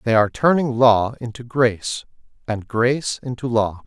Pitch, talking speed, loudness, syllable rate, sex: 120 Hz, 155 wpm, -20 LUFS, 4.9 syllables/s, male